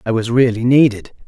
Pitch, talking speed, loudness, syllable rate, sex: 120 Hz, 190 wpm, -14 LUFS, 5.7 syllables/s, male